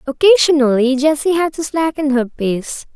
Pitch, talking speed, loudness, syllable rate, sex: 290 Hz, 140 wpm, -15 LUFS, 4.7 syllables/s, female